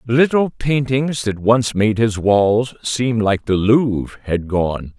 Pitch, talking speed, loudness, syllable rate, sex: 115 Hz, 155 wpm, -17 LUFS, 3.5 syllables/s, male